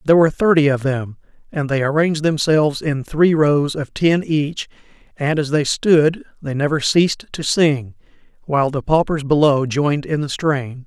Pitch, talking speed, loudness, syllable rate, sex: 150 Hz, 175 wpm, -17 LUFS, 4.9 syllables/s, male